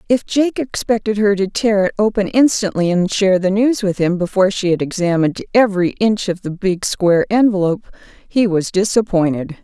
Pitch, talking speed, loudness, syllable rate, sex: 200 Hz, 180 wpm, -16 LUFS, 5.5 syllables/s, female